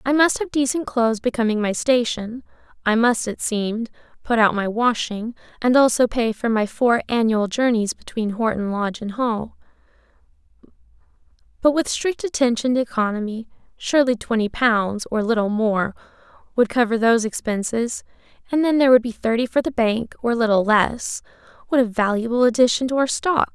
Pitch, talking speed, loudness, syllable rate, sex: 235 Hz, 165 wpm, -20 LUFS, 5.3 syllables/s, female